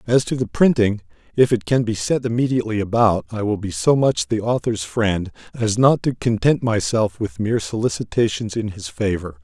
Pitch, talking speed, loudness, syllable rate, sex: 115 Hz, 190 wpm, -20 LUFS, 5.2 syllables/s, male